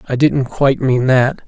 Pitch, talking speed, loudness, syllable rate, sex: 130 Hz, 205 wpm, -14 LUFS, 4.6 syllables/s, male